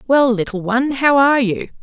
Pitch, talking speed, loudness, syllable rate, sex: 245 Hz, 195 wpm, -16 LUFS, 5.8 syllables/s, female